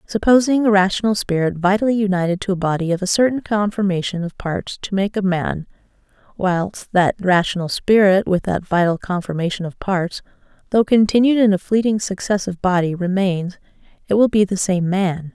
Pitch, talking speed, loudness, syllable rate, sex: 195 Hz, 170 wpm, -18 LUFS, 5.3 syllables/s, female